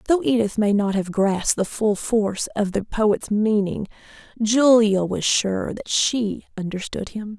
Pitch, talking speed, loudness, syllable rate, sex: 210 Hz, 165 wpm, -21 LUFS, 4.2 syllables/s, female